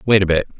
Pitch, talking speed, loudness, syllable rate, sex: 95 Hz, 300 wpm, -16 LUFS, 7.7 syllables/s, male